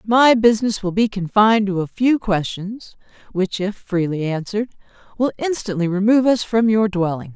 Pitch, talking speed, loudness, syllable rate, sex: 205 Hz, 165 wpm, -18 LUFS, 5.2 syllables/s, female